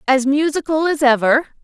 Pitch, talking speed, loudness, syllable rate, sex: 280 Hz, 145 wpm, -16 LUFS, 5.3 syllables/s, female